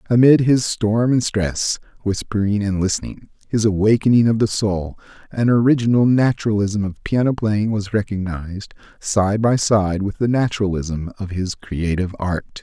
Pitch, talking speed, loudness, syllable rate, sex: 105 Hz, 145 wpm, -19 LUFS, 4.8 syllables/s, male